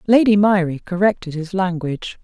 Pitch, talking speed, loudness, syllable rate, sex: 185 Hz, 135 wpm, -18 LUFS, 5.3 syllables/s, female